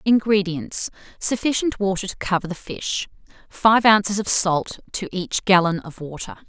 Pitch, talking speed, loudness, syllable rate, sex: 195 Hz, 140 wpm, -21 LUFS, 4.7 syllables/s, female